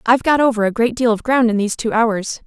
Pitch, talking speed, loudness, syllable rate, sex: 230 Hz, 290 wpm, -16 LUFS, 6.4 syllables/s, female